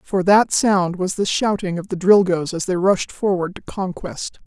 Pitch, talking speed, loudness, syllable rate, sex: 185 Hz, 200 wpm, -19 LUFS, 4.4 syllables/s, female